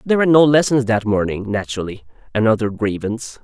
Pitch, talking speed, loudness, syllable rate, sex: 115 Hz, 140 wpm, -17 LUFS, 6.7 syllables/s, male